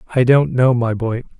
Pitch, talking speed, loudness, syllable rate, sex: 120 Hz, 215 wpm, -16 LUFS, 5.3 syllables/s, male